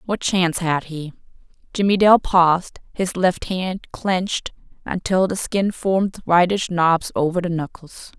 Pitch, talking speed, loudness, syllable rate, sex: 180 Hz, 145 wpm, -19 LUFS, 4.2 syllables/s, female